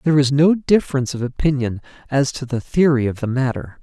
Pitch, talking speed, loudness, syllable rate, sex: 135 Hz, 205 wpm, -19 LUFS, 6.1 syllables/s, male